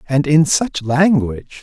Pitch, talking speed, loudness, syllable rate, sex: 145 Hz, 145 wpm, -15 LUFS, 4.1 syllables/s, male